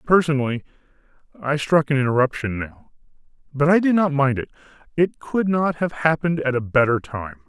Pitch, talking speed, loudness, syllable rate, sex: 145 Hz, 170 wpm, -21 LUFS, 5.6 syllables/s, male